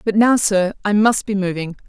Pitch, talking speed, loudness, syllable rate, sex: 200 Hz, 225 wpm, -17 LUFS, 5.0 syllables/s, female